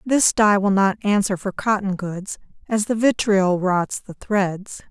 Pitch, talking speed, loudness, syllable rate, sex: 200 Hz, 170 wpm, -20 LUFS, 3.9 syllables/s, female